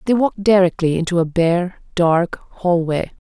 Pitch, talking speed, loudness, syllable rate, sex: 180 Hz, 145 wpm, -18 LUFS, 4.5 syllables/s, female